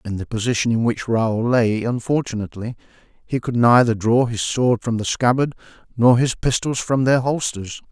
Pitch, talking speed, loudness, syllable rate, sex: 120 Hz, 175 wpm, -19 LUFS, 5.0 syllables/s, male